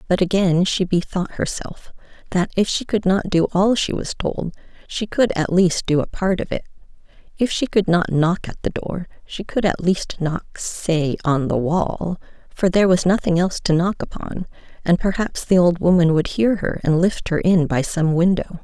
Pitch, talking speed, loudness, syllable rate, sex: 180 Hz, 195 wpm, -20 LUFS, 4.7 syllables/s, female